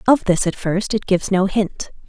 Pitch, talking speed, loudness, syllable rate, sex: 195 Hz, 230 wpm, -19 LUFS, 5.0 syllables/s, female